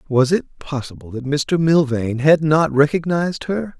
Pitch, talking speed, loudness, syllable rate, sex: 150 Hz, 160 wpm, -18 LUFS, 4.6 syllables/s, male